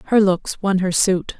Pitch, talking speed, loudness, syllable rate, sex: 190 Hz, 215 wpm, -18 LUFS, 4.4 syllables/s, female